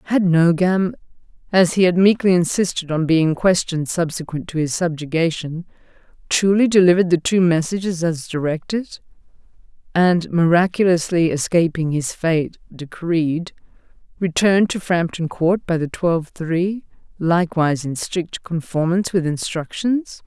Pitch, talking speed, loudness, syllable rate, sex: 170 Hz, 120 wpm, -19 LUFS, 4.7 syllables/s, female